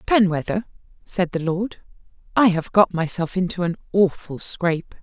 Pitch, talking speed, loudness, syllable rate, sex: 180 Hz, 145 wpm, -22 LUFS, 4.7 syllables/s, female